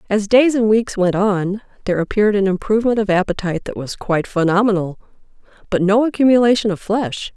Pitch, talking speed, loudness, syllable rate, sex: 205 Hz, 170 wpm, -17 LUFS, 6.1 syllables/s, female